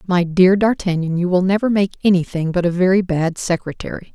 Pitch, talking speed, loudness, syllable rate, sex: 185 Hz, 190 wpm, -17 LUFS, 5.7 syllables/s, female